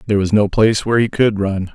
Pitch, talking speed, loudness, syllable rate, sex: 105 Hz, 275 wpm, -16 LUFS, 6.9 syllables/s, male